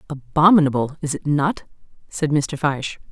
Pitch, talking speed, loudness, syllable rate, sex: 150 Hz, 135 wpm, -19 LUFS, 5.0 syllables/s, female